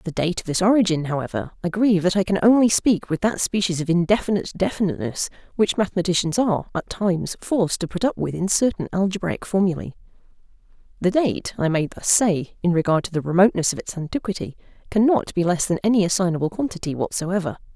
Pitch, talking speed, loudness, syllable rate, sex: 185 Hz, 190 wpm, -21 LUFS, 6.4 syllables/s, female